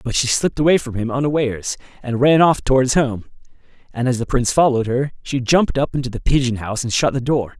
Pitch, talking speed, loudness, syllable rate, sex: 130 Hz, 230 wpm, -18 LUFS, 6.4 syllables/s, male